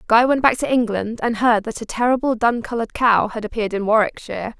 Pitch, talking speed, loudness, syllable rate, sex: 230 Hz, 220 wpm, -19 LUFS, 6.2 syllables/s, female